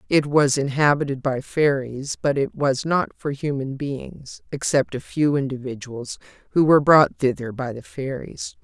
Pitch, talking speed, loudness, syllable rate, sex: 140 Hz, 160 wpm, -22 LUFS, 4.5 syllables/s, female